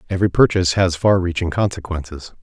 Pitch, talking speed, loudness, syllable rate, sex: 90 Hz, 150 wpm, -18 LUFS, 6.5 syllables/s, male